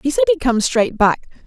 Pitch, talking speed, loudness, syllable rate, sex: 240 Hz, 245 wpm, -16 LUFS, 5.8 syllables/s, female